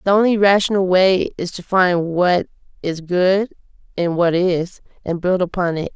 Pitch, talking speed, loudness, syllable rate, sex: 180 Hz, 170 wpm, -18 LUFS, 4.5 syllables/s, female